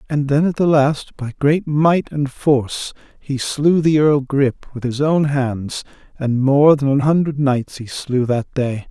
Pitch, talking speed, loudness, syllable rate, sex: 140 Hz, 195 wpm, -17 LUFS, 3.9 syllables/s, male